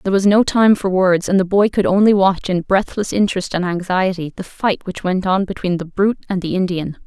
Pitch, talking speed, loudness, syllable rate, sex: 190 Hz, 240 wpm, -17 LUFS, 5.7 syllables/s, female